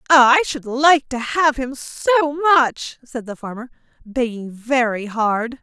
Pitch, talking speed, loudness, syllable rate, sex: 260 Hz, 150 wpm, -18 LUFS, 3.6 syllables/s, female